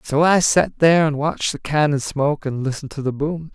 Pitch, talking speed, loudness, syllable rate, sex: 145 Hz, 235 wpm, -19 LUFS, 5.8 syllables/s, male